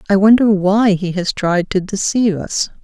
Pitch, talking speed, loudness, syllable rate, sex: 195 Hz, 190 wpm, -15 LUFS, 4.7 syllables/s, female